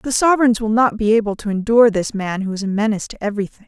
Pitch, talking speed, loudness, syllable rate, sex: 215 Hz, 260 wpm, -17 LUFS, 7.2 syllables/s, female